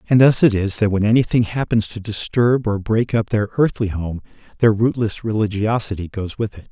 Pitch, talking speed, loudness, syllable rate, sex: 110 Hz, 195 wpm, -19 LUFS, 5.3 syllables/s, male